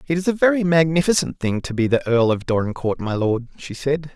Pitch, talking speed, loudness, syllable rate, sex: 140 Hz, 230 wpm, -20 LUFS, 5.7 syllables/s, male